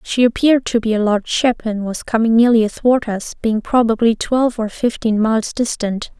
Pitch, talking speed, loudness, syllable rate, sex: 225 Hz, 195 wpm, -16 LUFS, 5.3 syllables/s, female